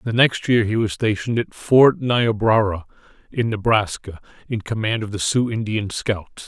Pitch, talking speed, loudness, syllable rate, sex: 110 Hz, 165 wpm, -20 LUFS, 4.6 syllables/s, male